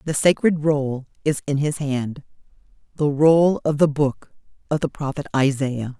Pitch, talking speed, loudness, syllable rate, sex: 145 Hz, 160 wpm, -21 LUFS, 4.3 syllables/s, female